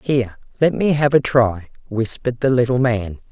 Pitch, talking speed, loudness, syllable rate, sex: 125 Hz, 180 wpm, -18 LUFS, 5.2 syllables/s, female